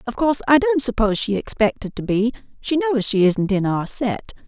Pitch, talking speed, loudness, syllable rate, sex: 235 Hz, 215 wpm, -20 LUFS, 5.7 syllables/s, female